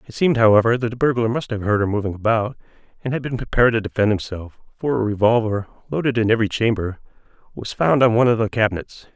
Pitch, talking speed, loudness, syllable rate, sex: 115 Hz, 215 wpm, -19 LUFS, 6.9 syllables/s, male